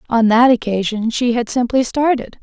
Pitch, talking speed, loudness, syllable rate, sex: 235 Hz, 175 wpm, -16 LUFS, 4.9 syllables/s, female